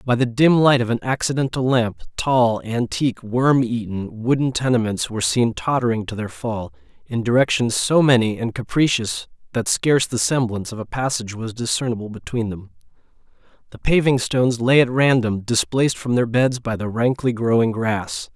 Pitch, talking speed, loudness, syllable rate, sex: 120 Hz, 170 wpm, -20 LUFS, 5.2 syllables/s, male